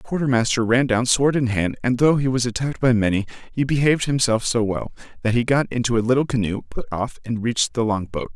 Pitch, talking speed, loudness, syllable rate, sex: 120 Hz, 245 wpm, -21 LUFS, 6.1 syllables/s, male